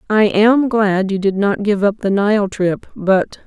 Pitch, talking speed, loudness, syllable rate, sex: 205 Hz, 210 wpm, -16 LUFS, 4.0 syllables/s, female